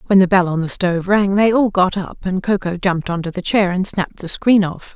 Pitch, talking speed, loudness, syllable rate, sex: 190 Hz, 280 wpm, -17 LUFS, 5.7 syllables/s, female